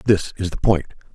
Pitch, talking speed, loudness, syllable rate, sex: 95 Hz, 210 wpm, -21 LUFS, 5.9 syllables/s, male